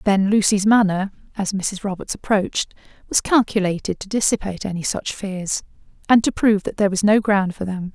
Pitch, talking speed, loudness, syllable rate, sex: 200 Hz, 190 wpm, -20 LUFS, 5.7 syllables/s, female